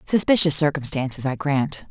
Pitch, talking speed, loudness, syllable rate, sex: 145 Hz, 125 wpm, -20 LUFS, 5.1 syllables/s, female